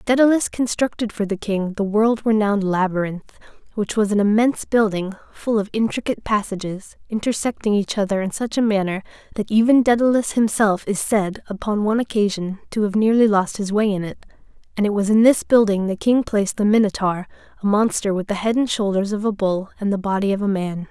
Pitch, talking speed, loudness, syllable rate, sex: 210 Hz, 200 wpm, -20 LUFS, 5.7 syllables/s, female